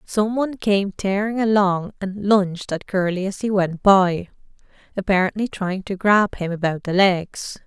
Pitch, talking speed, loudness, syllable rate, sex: 195 Hz, 165 wpm, -20 LUFS, 4.4 syllables/s, female